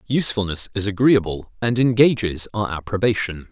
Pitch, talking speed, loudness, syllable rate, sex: 105 Hz, 120 wpm, -20 LUFS, 5.4 syllables/s, male